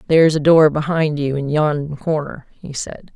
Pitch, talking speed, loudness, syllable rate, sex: 150 Hz, 190 wpm, -17 LUFS, 4.5 syllables/s, female